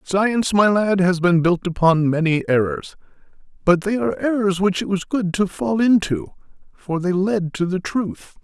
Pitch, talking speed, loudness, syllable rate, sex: 185 Hz, 185 wpm, -19 LUFS, 4.6 syllables/s, male